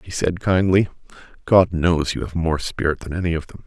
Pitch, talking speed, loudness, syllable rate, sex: 85 Hz, 215 wpm, -20 LUFS, 5.3 syllables/s, male